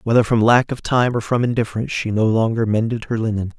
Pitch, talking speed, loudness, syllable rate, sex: 115 Hz, 235 wpm, -18 LUFS, 6.5 syllables/s, male